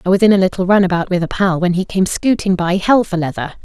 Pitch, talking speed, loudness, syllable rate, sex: 185 Hz, 295 wpm, -15 LUFS, 6.3 syllables/s, female